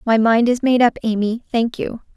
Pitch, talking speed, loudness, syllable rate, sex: 230 Hz, 220 wpm, -18 LUFS, 4.9 syllables/s, female